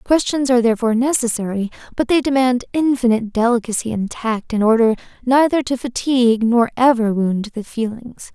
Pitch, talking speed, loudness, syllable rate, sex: 240 Hz, 150 wpm, -17 LUFS, 5.5 syllables/s, female